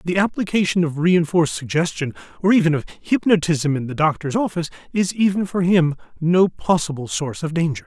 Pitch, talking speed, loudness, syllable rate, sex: 170 Hz, 170 wpm, -20 LUFS, 5.8 syllables/s, male